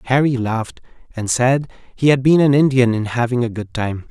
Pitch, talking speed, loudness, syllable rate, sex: 125 Hz, 205 wpm, -17 LUFS, 5.4 syllables/s, male